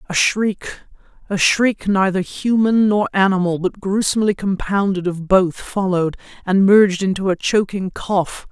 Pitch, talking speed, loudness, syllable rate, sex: 195 Hz, 125 wpm, -17 LUFS, 4.6 syllables/s, female